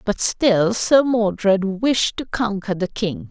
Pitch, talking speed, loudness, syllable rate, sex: 205 Hz, 165 wpm, -19 LUFS, 3.4 syllables/s, female